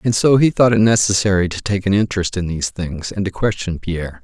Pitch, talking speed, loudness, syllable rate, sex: 100 Hz, 240 wpm, -17 LUFS, 6.1 syllables/s, male